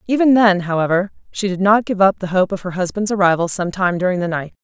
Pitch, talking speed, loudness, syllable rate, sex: 190 Hz, 235 wpm, -17 LUFS, 6.7 syllables/s, female